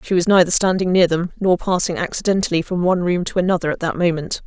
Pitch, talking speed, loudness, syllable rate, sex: 180 Hz, 230 wpm, -18 LUFS, 6.5 syllables/s, female